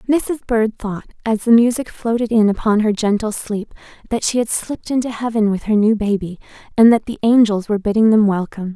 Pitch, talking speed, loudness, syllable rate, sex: 220 Hz, 205 wpm, -17 LUFS, 5.8 syllables/s, female